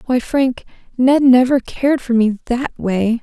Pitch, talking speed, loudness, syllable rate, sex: 250 Hz, 150 wpm, -16 LUFS, 4.0 syllables/s, female